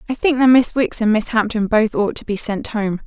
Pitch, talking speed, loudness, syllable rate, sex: 225 Hz, 275 wpm, -17 LUFS, 5.2 syllables/s, female